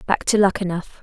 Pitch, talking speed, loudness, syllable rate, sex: 190 Hz, 175 wpm, -20 LUFS, 5.6 syllables/s, female